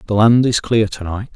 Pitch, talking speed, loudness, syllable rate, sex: 110 Hz, 265 wpm, -16 LUFS, 5.2 syllables/s, male